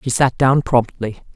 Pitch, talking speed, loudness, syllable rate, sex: 125 Hz, 175 wpm, -16 LUFS, 4.3 syllables/s, female